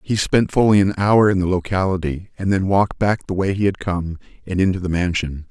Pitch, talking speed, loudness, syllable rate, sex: 95 Hz, 230 wpm, -19 LUFS, 5.7 syllables/s, male